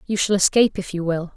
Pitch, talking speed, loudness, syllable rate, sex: 185 Hz, 265 wpm, -20 LUFS, 6.6 syllables/s, female